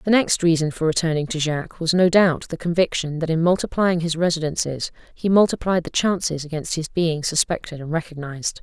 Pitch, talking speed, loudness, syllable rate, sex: 165 Hz, 190 wpm, -21 LUFS, 5.7 syllables/s, female